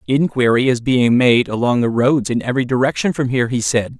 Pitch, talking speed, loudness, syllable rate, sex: 125 Hz, 210 wpm, -16 LUFS, 5.7 syllables/s, male